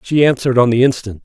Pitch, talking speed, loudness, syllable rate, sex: 120 Hz, 240 wpm, -14 LUFS, 7.1 syllables/s, male